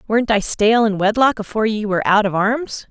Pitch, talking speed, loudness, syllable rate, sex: 215 Hz, 225 wpm, -17 LUFS, 6.3 syllables/s, female